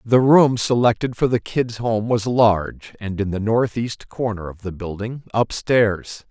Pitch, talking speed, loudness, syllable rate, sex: 110 Hz, 170 wpm, -20 LUFS, 4.1 syllables/s, male